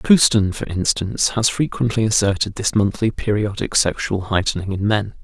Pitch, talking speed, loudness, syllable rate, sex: 105 Hz, 150 wpm, -19 LUFS, 5.1 syllables/s, male